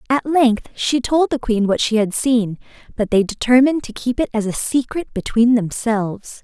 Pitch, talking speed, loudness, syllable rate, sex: 235 Hz, 195 wpm, -18 LUFS, 4.9 syllables/s, female